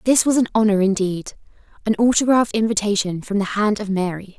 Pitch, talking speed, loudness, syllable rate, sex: 210 Hz, 165 wpm, -19 LUFS, 5.7 syllables/s, female